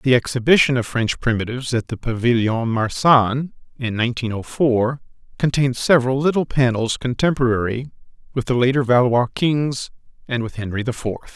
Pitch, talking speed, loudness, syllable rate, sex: 125 Hz, 150 wpm, -19 LUFS, 5.3 syllables/s, male